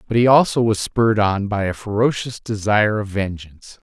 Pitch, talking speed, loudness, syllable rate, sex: 105 Hz, 185 wpm, -18 LUFS, 5.5 syllables/s, male